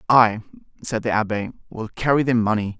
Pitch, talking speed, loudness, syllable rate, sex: 115 Hz, 170 wpm, -21 LUFS, 5.4 syllables/s, male